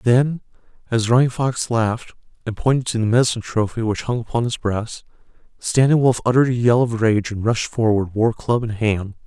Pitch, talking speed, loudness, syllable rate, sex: 115 Hz, 195 wpm, -19 LUFS, 5.5 syllables/s, male